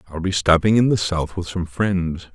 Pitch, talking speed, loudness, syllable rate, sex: 90 Hz, 230 wpm, -20 LUFS, 4.9 syllables/s, male